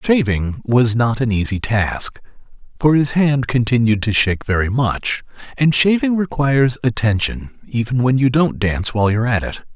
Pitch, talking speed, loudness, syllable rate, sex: 125 Hz, 170 wpm, -17 LUFS, 5.1 syllables/s, male